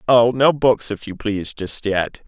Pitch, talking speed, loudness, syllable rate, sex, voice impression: 110 Hz, 210 wpm, -19 LUFS, 4.4 syllables/s, male, very masculine, old, very thick, tensed, powerful, slightly weak, slightly dark, soft, slightly clear, fluent, slightly raspy, cool, very intellectual, refreshing, very sincere, calm, mature, very friendly, reassuring, unique, elegant, wild, slightly sweet, kind, modest